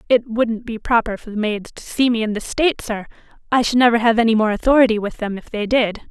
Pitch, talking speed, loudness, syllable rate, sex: 225 Hz, 255 wpm, -18 LUFS, 6.1 syllables/s, female